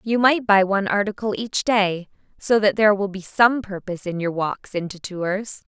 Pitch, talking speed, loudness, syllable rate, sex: 200 Hz, 200 wpm, -21 LUFS, 4.9 syllables/s, female